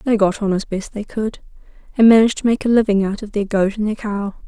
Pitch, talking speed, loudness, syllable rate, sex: 210 Hz, 270 wpm, -18 LUFS, 6.2 syllables/s, female